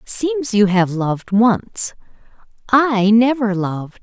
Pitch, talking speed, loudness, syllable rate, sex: 220 Hz, 135 wpm, -17 LUFS, 3.8 syllables/s, female